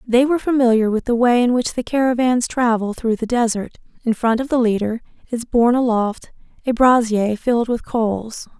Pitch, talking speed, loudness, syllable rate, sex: 235 Hz, 190 wpm, -18 LUFS, 5.3 syllables/s, female